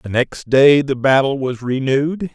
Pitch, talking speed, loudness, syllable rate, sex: 135 Hz, 180 wpm, -16 LUFS, 4.4 syllables/s, male